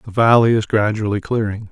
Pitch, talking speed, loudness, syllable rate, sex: 110 Hz, 175 wpm, -16 LUFS, 5.4 syllables/s, male